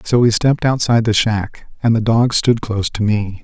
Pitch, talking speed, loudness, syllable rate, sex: 110 Hz, 225 wpm, -16 LUFS, 5.3 syllables/s, male